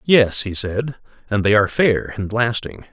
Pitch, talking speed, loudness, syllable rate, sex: 110 Hz, 185 wpm, -18 LUFS, 4.5 syllables/s, male